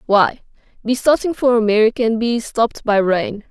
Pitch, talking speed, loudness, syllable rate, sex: 230 Hz, 170 wpm, -17 LUFS, 5.1 syllables/s, female